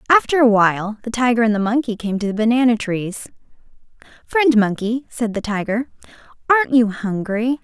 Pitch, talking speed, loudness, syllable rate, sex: 230 Hz, 165 wpm, -18 LUFS, 5.3 syllables/s, female